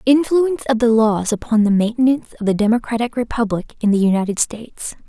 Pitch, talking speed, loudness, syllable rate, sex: 230 Hz, 175 wpm, -17 LUFS, 6.3 syllables/s, female